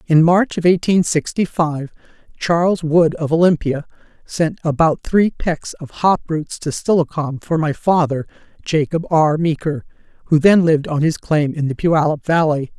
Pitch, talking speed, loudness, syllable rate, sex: 160 Hz, 165 wpm, -17 LUFS, 4.5 syllables/s, female